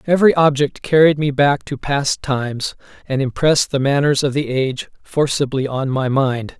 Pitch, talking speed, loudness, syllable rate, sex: 140 Hz, 175 wpm, -17 LUFS, 5.0 syllables/s, male